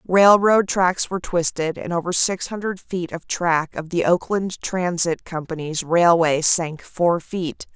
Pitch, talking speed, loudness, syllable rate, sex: 175 Hz, 155 wpm, -20 LUFS, 4.0 syllables/s, female